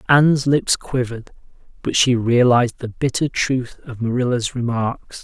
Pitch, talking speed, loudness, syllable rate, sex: 125 Hz, 140 wpm, -19 LUFS, 4.7 syllables/s, male